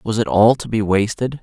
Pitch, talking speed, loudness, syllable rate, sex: 110 Hz, 255 wpm, -17 LUFS, 5.0 syllables/s, male